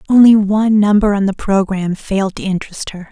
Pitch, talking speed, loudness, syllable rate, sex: 200 Hz, 190 wpm, -14 LUFS, 5.8 syllables/s, female